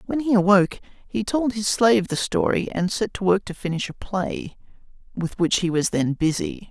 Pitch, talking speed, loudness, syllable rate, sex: 200 Hz, 205 wpm, -22 LUFS, 5.1 syllables/s, male